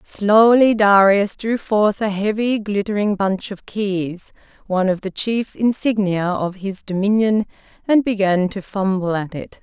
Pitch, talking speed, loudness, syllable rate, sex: 205 Hz, 150 wpm, -18 LUFS, 4.2 syllables/s, female